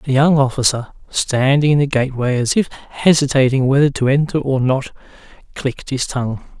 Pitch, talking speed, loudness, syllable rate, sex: 135 Hz, 165 wpm, -16 LUFS, 5.5 syllables/s, male